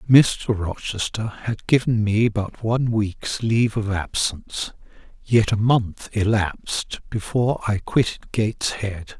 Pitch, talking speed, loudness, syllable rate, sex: 110 Hz, 125 wpm, -22 LUFS, 4.0 syllables/s, male